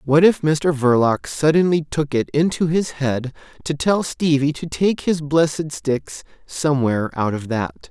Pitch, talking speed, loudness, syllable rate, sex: 150 Hz, 165 wpm, -19 LUFS, 4.3 syllables/s, male